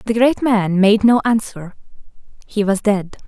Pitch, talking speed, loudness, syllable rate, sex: 210 Hz, 165 wpm, -16 LUFS, 4.3 syllables/s, female